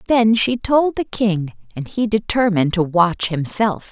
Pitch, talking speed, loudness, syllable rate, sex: 205 Hz, 170 wpm, -18 LUFS, 4.3 syllables/s, female